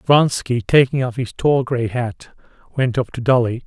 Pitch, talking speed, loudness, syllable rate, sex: 125 Hz, 180 wpm, -18 LUFS, 4.4 syllables/s, male